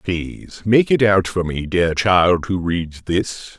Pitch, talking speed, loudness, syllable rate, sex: 95 Hz, 185 wpm, -18 LUFS, 3.6 syllables/s, male